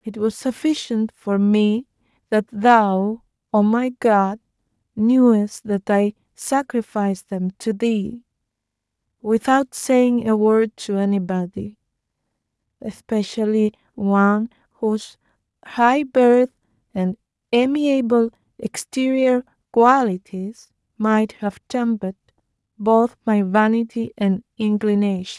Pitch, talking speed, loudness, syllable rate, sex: 220 Hz, 95 wpm, -19 LUFS, 3.3 syllables/s, female